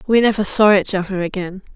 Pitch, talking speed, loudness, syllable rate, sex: 195 Hz, 205 wpm, -17 LUFS, 5.9 syllables/s, female